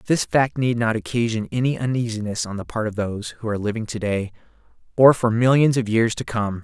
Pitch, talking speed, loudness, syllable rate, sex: 115 Hz, 215 wpm, -21 LUFS, 5.7 syllables/s, male